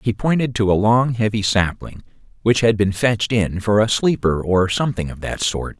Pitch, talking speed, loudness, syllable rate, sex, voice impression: 105 Hz, 205 wpm, -18 LUFS, 5.1 syllables/s, male, masculine, middle-aged, tensed, powerful, hard, fluent, cool, intellectual, calm, friendly, wild, very sweet, slightly kind